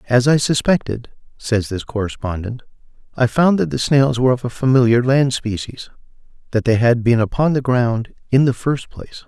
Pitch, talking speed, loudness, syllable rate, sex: 125 Hz, 175 wpm, -17 LUFS, 5.3 syllables/s, male